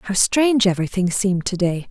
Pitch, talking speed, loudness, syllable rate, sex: 200 Hz, 190 wpm, -19 LUFS, 5.9 syllables/s, female